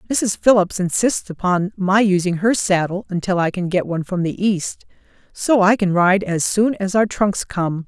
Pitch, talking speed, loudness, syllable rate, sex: 190 Hz, 200 wpm, -18 LUFS, 4.6 syllables/s, female